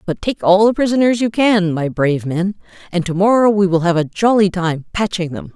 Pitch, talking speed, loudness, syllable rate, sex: 190 Hz, 225 wpm, -16 LUFS, 5.4 syllables/s, female